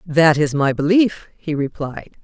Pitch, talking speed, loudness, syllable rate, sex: 160 Hz, 160 wpm, -18 LUFS, 3.9 syllables/s, female